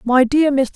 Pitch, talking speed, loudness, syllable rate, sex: 265 Hz, 240 wpm, -15 LUFS, 4.6 syllables/s, female